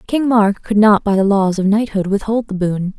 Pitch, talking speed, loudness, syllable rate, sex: 205 Hz, 240 wpm, -15 LUFS, 5.0 syllables/s, female